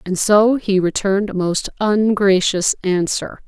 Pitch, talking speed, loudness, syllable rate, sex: 200 Hz, 140 wpm, -17 LUFS, 4.0 syllables/s, female